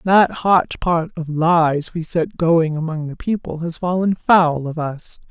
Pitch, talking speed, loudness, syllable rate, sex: 165 Hz, 180 wpm, -18 LUFS, 3.8 syllables/s, female